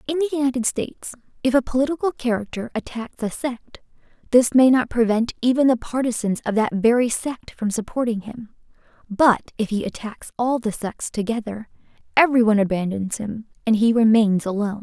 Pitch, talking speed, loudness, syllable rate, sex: 235 Hz, 160 wpm, -21 LUFS, 5.5 syllables/s, female